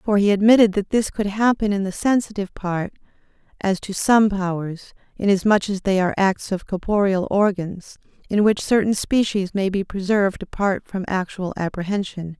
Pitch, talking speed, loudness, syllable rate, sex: 200 Hz, 165 wpm, -20 LUFS, 5.2 syllables/s, female